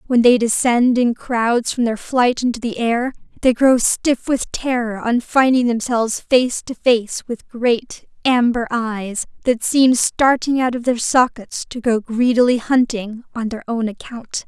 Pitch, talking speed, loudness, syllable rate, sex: 240 Hz, 170 wpm, -18 LUFS, 4.0 syllables/s, female